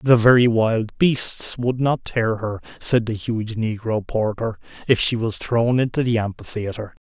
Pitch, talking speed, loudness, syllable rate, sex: 115 Hz, 170 wpm, -21 LUFS, 4.2 syllables/s, male